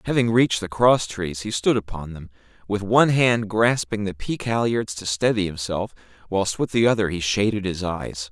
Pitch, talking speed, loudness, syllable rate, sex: 105 Hz, 195 wpm, -22 LUFS, 5.0 syllables/s, male